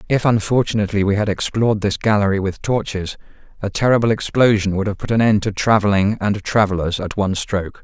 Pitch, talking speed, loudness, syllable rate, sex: 105 Hz, 185 wpm, -18 LUFS, 6.1 syllables/s, male